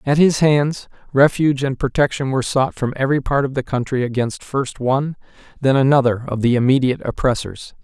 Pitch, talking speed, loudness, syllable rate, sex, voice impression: 135 Hz, 175 wpm, -18 LUFS, 5.8 syllables/s, male, masculine, adult-like, tensed, powerful, clear, raspy, mature, wild, lively, strict, slightly sharp